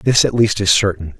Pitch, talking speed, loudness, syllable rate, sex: 100 Hz, 250 wpm, -15 LUFS, 5.3 syllables/s, male